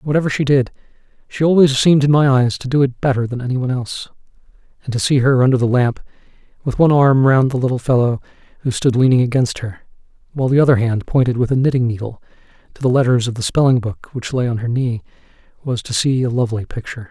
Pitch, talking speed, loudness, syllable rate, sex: 125 Hz, 220 wpm, -16 LUFS, 6.6 syllables/s, male